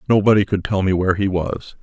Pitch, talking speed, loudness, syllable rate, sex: 95 Hz, 230 wpm, -18 LUFS, 6.2 syllables/s, male